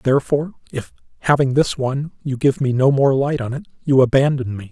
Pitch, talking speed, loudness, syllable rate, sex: 135 Hz, 205 wpm, -18 LUFS, 5.9 syllables/s, male